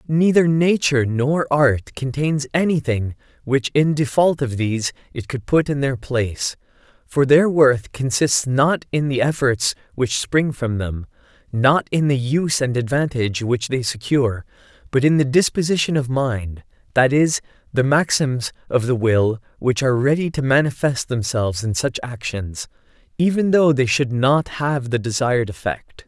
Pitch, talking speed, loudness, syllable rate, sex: 130 Hz, 160 wpm, -19 LUFS, 4.6 syllables/s, male